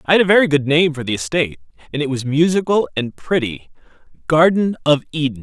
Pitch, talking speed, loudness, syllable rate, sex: 150 Hz, 200 wpm, -17 LUFS, 6.2 syllables/s, male